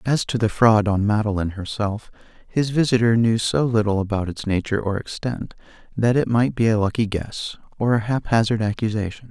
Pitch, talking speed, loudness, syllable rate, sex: 110 Hz, 185 wpm, -21 LUFS, 5.5 syllables/s, male